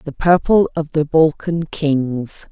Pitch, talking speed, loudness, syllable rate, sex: 155 Hz, 145 wpm, -17 LUFS, 3.3 syllables/s, female